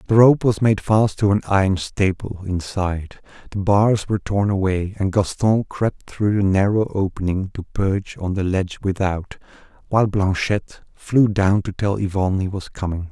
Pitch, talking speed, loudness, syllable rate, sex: 100 Hz, 175 wpm, -20 LUFS, 4.8 syllables/s, male